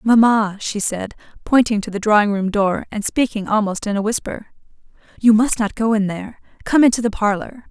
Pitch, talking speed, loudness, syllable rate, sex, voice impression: 215 Hz, 195 wpm, -18 LUFS, 5.4 syllables/s, female, very feminine, slightly young, slightly adult-like, very thin, tensed, slightly powerful, bright, very hard, very clear, fluent, cool, very intellectual, very refreshing, sincere, calm, friendly, reassuring, slightly unique, elegant, sweet, lively, slightly strict, slightly sharp